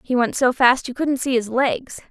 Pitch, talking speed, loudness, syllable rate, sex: 250 Hz, 255 wpm, -19 LUFS, 4.6 syllables/s, female